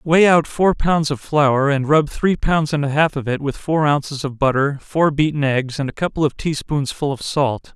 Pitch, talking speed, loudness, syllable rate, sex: 145 Hz, 240 wpm, -18 LUFS, 4.7 syllables/s, male